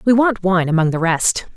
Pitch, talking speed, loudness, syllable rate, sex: 190 Hz, 230 wpm, -16 LUFS, 5.1 syllables/s, female